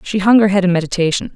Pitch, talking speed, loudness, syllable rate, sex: 190 Hz, 265 wpm, -14 LUFS, 7.2 syllables/s, female